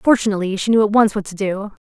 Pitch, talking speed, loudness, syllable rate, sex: 205 Hz, 260 wpm, -18 LUFS, 6.9 syllables/s, female